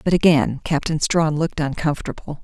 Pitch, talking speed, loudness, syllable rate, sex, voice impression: 155 Hz, 150 wpm, -20 LUFS, 5.7 syllables/s, female, very feminine, very adult-like, middle-aged, slightly thin, slightly tensed, weak, slightly dark, hard, clear, fluent, slightly raspy, very cool, intellectual, refreshing, very sincere, very calm, friendly, reassuring, slightly unique, very elegant, slightly wild, slightly sweet, slightly lively, strict, slightly modest, slightly light